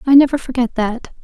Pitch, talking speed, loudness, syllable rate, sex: 255 Hz, 195 wpm, -16 LUFS, 5.7 syllables/s, female